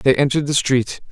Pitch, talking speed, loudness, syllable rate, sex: 135 Hz, 215 wpm, -18 LUFS, 6.3 syllables/s, male